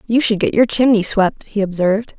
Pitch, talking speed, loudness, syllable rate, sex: 215 Hz, 220 wpm, -16 LUFS, 5.4 syllables/s, female